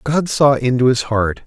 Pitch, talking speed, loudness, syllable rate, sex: 130 Hz, 205 wpm, -16 LUFS, 4.4 syllables/s, male